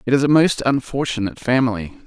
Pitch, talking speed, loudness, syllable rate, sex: 125 Hz, 175 wpm, -19 LUFS, 6.5 syllables/s, male